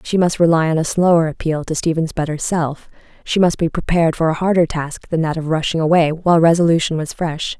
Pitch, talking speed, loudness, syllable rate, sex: 165 Hz, 220 wpm, -17 LUFS, 5.7 syllables/s, female